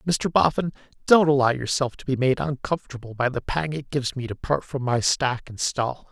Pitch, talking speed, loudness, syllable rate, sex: 130 Hz, 215 wpm, -23 LUFS, 5.4 syllables/s, male